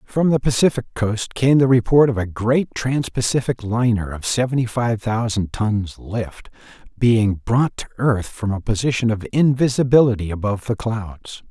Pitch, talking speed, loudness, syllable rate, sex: 115 Hz, 155 wpm, -19 LUFS, 4.6 syllables/s, male